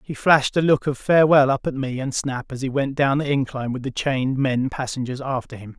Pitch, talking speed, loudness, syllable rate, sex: 135 Hz, 250 wpm, -21 LUFS, 5.8 syllables/s, male